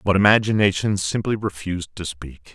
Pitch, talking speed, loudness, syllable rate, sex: 95 Hz, 140 wpm, -21 LUFS, 5.4 syllables/s, male